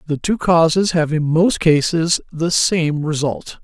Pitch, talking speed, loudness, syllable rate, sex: 160 Hz, 165 wpm, -17 LUFS, 3.9 syllables/s, male